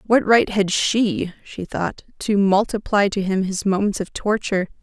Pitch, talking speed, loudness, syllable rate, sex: 200 Hz, 175 wpm, -20 LUFS, 4.4 syllables/s, female